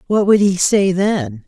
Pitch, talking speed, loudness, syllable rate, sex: 185 Hz, 205 wpm, -15 LUFS, 3.8 syllables/s, female